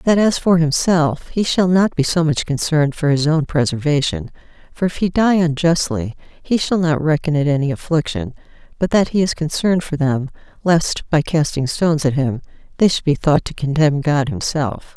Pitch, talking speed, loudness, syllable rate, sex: 155 Hz, 195 wpm, -17 LUFS, 5.0 syllables/s, female